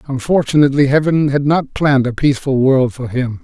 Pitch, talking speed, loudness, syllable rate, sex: 135 Hz, 175 wpm, -14 LUFS, 5.8 syllables/s, male